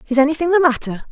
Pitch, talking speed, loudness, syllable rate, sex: 285 Hz, 215 wpm, -16 LUFS, 7.9 syllables/s, female